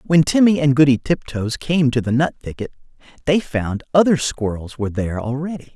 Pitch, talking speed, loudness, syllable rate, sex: 140 Hz, 175 wpm, -19 LUFS, 5.5 syllables/s, male